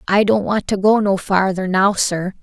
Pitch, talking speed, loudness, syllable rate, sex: 195 Hz, 225 wpm, -17 LUFS, 4.5 syllables/s, female